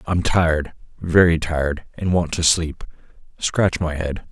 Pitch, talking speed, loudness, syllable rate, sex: 80 Hz, 140 wpm, -20 LUFS, 4.2 syllables/s, male